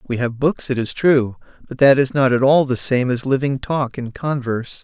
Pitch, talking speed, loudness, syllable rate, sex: 130 Hz, 235 wpm, -18 LUFS, 5.0 syllables/s, male